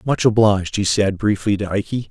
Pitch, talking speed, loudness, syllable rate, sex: 105 Hz, 200 wpm, -18 LUFS, 5.5 syllables/s, male